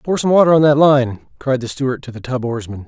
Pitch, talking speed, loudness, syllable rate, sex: 135 Hz, 270 wpm, -15 LUFS, 6.2 syllables/s, male